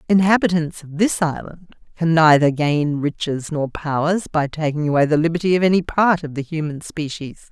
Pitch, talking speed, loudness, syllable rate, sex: 160 Hz, 175 wpm, -19 LUFS, 5.2 syllables/s, female